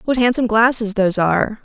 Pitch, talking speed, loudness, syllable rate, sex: 220 Hz, 185 wpm, -16 LUFS, 6.5 syllables/s, female